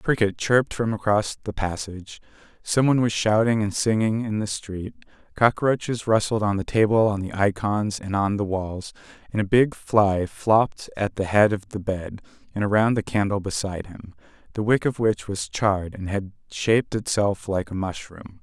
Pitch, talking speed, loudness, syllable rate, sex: 105 Hz, 185 wpm, -23 LUFS, 5.0 syllables/s, male